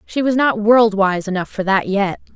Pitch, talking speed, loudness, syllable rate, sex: 210 Hz, 230 wpm, -16 LUFS, 4.7 syllables/s, female